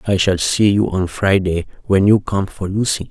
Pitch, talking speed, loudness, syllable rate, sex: 95 Hz, 210 wpm, -17 LUFS, 4.7 syllables/s, male